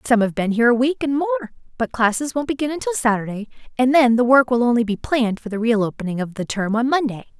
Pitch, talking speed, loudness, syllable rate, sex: 240 Hz, 250 wpm, -19 LUFS, 6.6 syllables/s, female